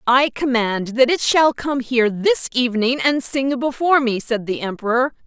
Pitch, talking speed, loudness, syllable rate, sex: 250 Hz, 180 wpm, -18 LUFS, 4.9 syllables/s, female